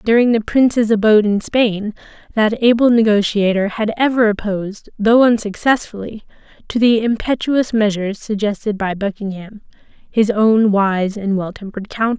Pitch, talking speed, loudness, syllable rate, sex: 215 Hz, 140 wpm, -16 LUFS, 5.0 syllables/s, female